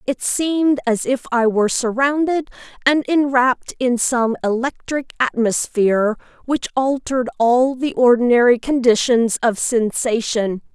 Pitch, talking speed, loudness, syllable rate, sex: 250 Hz, 115 wpm, -18 LUFS, 4.5 syllables/s, female